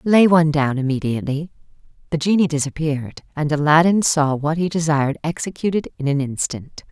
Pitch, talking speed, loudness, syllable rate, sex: 155 Hz, 150 wpm, -19 LUFS, 5.8 syllables/s, female